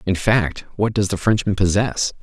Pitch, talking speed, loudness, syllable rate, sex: 100 Hz, 190 wpm, -19 LUFS, 4.7 syllables/s, male